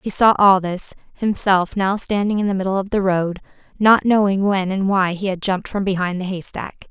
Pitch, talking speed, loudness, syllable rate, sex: 195 Hz, 215 wpm, -18 LUFS, 5.1 syllables/s, female